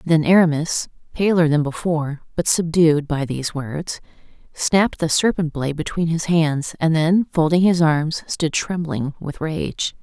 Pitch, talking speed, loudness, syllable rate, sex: 160 Hz, 155 wpm, -19 LUFS, 4.4 syllables/s, female